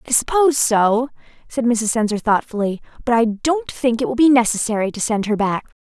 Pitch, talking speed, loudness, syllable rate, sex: 235 Hz, 195 wpm, -18 LUFS, 5.5 syllables/s, female